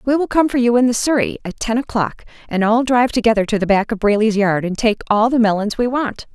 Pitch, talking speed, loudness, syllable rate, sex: 225 Hz, 265 wpm, -17 LUFS, 6.1 syllables/s, female